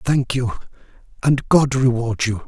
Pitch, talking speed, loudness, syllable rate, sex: 125 Hz, 145 wpm, -19 LUFS, 4.2 syllables/s, male